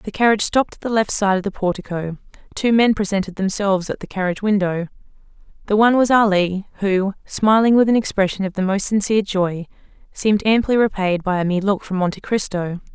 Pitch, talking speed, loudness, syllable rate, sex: 200 Hz, 195 wpm, -19 LUFS, 6.1 syllables/s, female